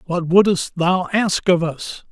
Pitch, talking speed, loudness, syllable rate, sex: 180 Hz, 170 wpm, -18 LUFS, 3.2 syllables/s, male